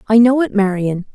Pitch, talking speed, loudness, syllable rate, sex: 215 Hz, 210 wpm, -15 LUFS, 5.3 syllables/s, female